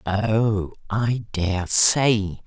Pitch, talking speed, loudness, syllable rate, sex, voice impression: 115 Hz, 95 wpm, -21 LUFS, 2.0 syllables/s, female, feminine, slightly old, slightly muffled, calm, slightly unique, kind